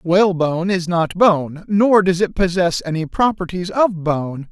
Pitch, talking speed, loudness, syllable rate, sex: 180 Hz, 160 wpm, -17 LUFS, 4.3 syllables/s, male